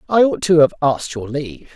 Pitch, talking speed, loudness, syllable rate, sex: 150 Hz, 240 wpm, -17 LUFS, 6.1 syllables/s, male